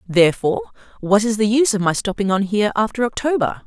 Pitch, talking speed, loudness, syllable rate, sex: 215 Hz, 195 wpm, -18 LUFS, 6.7 syllables/s, female